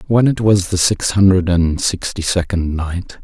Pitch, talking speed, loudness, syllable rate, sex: 95 Hz, 185 wpm, -16 LUFS, 4.3 syllables/s, male